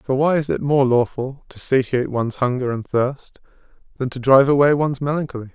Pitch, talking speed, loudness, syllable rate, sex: 130 Hz, 195 wpm, -19 LUFS, 6.0 syllables/s, male